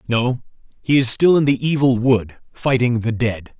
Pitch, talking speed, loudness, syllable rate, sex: 125 Hz, 185 wpm, -17 LUFS, 4.4 syllables/s, male